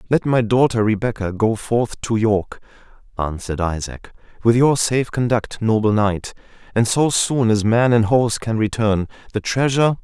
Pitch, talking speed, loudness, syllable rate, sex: 115 Hz, 160 wpm, -19 LUFS, 4.9 syllables/s, male